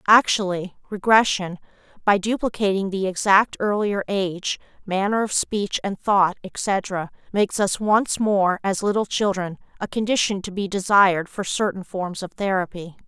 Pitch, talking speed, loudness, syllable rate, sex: 195 Hz, 140 wpm, -22 LUFS, 4.6 syllables/s, female